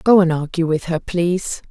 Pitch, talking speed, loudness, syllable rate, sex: 170 Hz, 210 wpm, -19 LUFS, 5.0 syllables/s, female